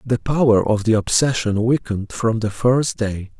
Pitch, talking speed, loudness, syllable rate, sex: 115 Hz, 175 wpm, -19 LUFS, 4.6 syllables/s, male